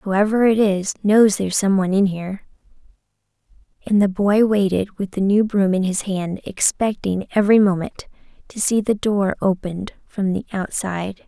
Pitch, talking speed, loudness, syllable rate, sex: 200 Hz, 160 wpm, -19 LUFS, 5.0 syllables/s, female